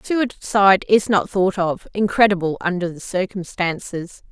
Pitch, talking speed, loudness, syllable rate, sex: 190 Hz, 110 wpm, -19 LUFS, 4.4 syllables/s, female